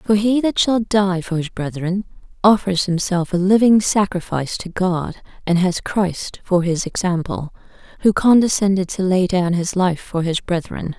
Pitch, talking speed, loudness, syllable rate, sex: 185 Hz, 170 wpm, -18 LUFS, 4.5 syllables/s, female